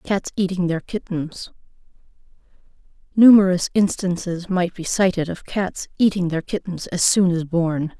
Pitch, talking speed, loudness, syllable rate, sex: 180 Hz, 130 wpm, -20 LUFS, 4.5 syllables/s, female